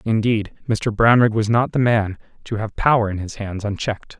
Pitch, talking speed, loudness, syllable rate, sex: 110 Hz, 200 wpm, -19 LUFS, 5.2 syllables/s, male